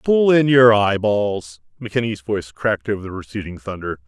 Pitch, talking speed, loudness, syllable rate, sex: 105 Hz, 160 wpm, -19 LUFS, 5.6 syllables/s, male